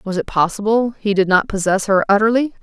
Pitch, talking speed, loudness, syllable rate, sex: 205 Hz, 205 wpm, -16 LUFS, 5.7 syllables/s, female